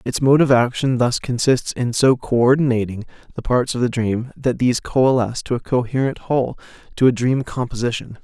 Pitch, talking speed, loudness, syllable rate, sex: 125 Hz, 180 wpm, -19 LUFS, 5.4 syllables/s, male